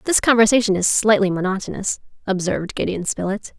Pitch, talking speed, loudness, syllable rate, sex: 205 Hz, 135 wpm, -19 LUFS, 6.0 syllables/s, female